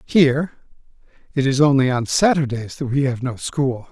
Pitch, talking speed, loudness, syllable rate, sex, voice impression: 135 Hz, 170 wpm, -19 LUFS, 5.0 syllables/s, male, masculine, slightly old, slightly powerful, soft, halting, raspy, calm, mature, friendly, slightly reassuring, wild, lively, kind